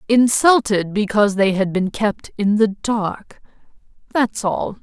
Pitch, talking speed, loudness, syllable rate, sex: 210 Hz, 125 wpm, -18 LUFS, 3.9 syllables/s, female